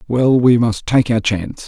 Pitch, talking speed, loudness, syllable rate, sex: 115 Hz, 215 wpm, -15 LUFS, 4.6 syllables/s, male